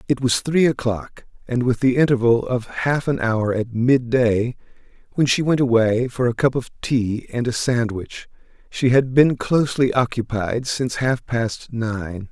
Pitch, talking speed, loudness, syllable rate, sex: 120 Hz, 170 wpm, -20 LUFS, 4.3 syllables/s, male